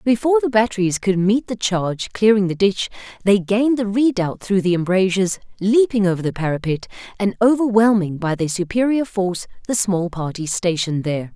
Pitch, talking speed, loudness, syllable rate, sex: 200 Hz, 170 wpm, -19 LUFS, 5.6 syllables/s, female